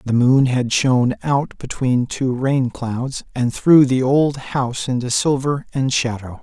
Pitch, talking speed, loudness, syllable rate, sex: 130 Hz, 170 wpm, -18 LUFS, 4.0 syllables/s, male